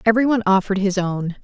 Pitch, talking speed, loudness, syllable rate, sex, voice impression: 200 Hz, 170 wpm, -19 LUFS, 7.3 syllables/s, female, very feminine, adult-like, slightly middle-aged, thin, slightly tensed, slightly weak, bright, slightly hard, clear, cool, very intellectual, refreshing, very sincere, very calm, very friendly, very reassuring, unique, very elegant, slightly wild, very sweet, slightly lively, very kind, modest, light